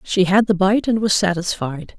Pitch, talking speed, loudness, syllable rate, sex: 190 Hz, 210 wpm, -18 LUFS, 4.8 syllables/s, female